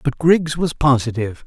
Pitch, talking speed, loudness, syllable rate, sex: 140 Hz, 165 wpm, -18 LUFS, 5.1 syllables/s, male